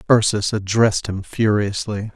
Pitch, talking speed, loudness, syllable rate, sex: 105 Hz, 110 wpm, -19 LUFS, 4.7 syllables/s, male